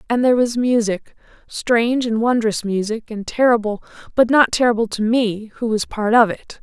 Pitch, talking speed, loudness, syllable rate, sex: 225 Hz, 165 wpm, -18 LUFS, 5.0 syllables/s, female